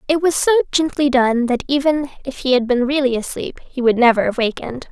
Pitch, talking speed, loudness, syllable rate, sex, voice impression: 265 Hz, 220 wpm, -17 LUFS, 5.8 syllables/s, female, feminine, slightly young, cute, refreshing, friendly, slightly lively